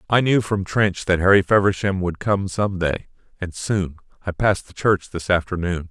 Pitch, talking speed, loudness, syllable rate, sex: 95 Hz, 195 wpm, -20 LUFS, 4.9 syllables/s, male